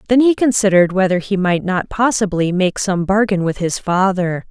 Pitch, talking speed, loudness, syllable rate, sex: 195 Hz, 185 wpm, -16 LUFS, 5.1 syllables/s, female